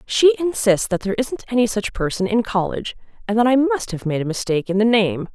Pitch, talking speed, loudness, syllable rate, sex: 215 Hz, 235 wpm, -19 LUFS, 6.1 syllables/s, female